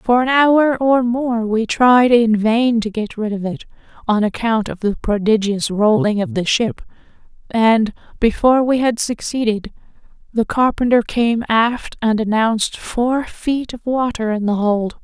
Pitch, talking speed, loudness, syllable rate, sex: 230 Hz, 165 wpm, -17 LUFS, 4.2 syllables/s, female